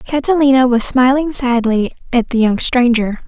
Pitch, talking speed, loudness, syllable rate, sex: 250 Hz, 145 wpm, -14 LUFS, 4.6 syllables/s, female